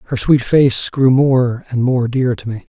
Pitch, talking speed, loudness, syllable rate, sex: 125 Hz, 220 wpm, -15 LUFS, 4.2 syllables/s, male